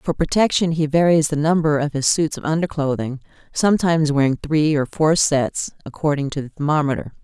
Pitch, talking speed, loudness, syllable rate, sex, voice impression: 150 Hz, 175 wpm, -19 LUFS, 5.5 syllables/s, female, very feminine, very adult-like, very middle-aged, slightly thin, tensed, powerful, slightly bright, slightly hard, very clear, fluent, cool, very intellectual, slightly refreshing, very sincere, calm, friendly, reassuring, slightly unique, elegant, slightly wild, lively, kind, slightly intense